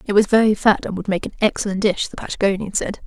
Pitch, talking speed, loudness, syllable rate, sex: 200 Hz, 255 wpm, -19 LUFS, 6.6 syllables/s, female